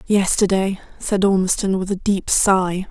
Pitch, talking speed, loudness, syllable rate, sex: 190 Hz, 145 wpm, -18 LUFS, 4.3 syllables/s, female